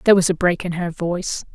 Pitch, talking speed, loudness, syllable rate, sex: 175 Hz, 270 wpm, -20 LUFS, 6.6 syllables/s, female